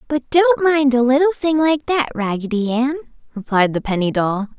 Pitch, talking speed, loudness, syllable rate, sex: 255 Hz, 185 wpm, -17 LUFS, 4.9 syllables/s, female